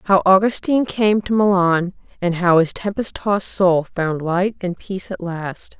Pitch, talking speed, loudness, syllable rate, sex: 185 Hz, 175 wpm, -18 LUFS, 4.5 syllables/s, female